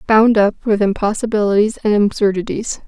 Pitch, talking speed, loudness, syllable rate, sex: 210 Hz, 125 wpm, -16 LUFS, 5.3 syllables/s, female